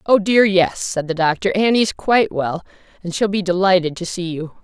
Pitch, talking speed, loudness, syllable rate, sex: 185 Hz, 205 wpm, -18 LUFS, 5.1 syllables/s, female